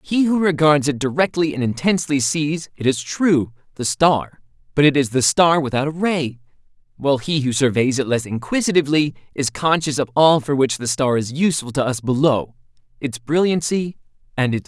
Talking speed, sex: 190 wpm, male